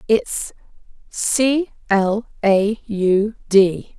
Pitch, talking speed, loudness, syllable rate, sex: 210 Hz, 90 wpm, -18 LUFS, 2.2 syllables/s, female